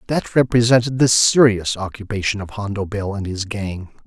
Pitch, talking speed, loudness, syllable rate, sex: 105 Hz, 160 wpm, -18 LUFS, 5.1 syllables/s, male